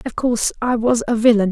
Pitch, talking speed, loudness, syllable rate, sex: 230 Hz, 240 wpm, -18 LUFS, 6.0 syllables/s, female